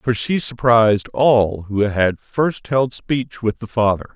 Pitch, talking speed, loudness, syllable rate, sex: 115 Hz, 175 wpm, -18 LUFS, 3.8 syllables/s, male